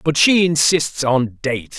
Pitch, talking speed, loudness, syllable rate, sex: 150 Hz, 170 wpm, -16 LUFS, 4.2 syllables/s, male